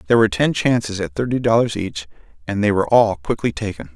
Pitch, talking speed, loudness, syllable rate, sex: 100 Hz, 210 wpm, -19 LUFS, 6.5 syllables/s, male